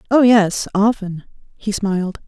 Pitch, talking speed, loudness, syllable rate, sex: 205 Hz, 130 wpm, -17 LUFS, 4.2 syllables/s, female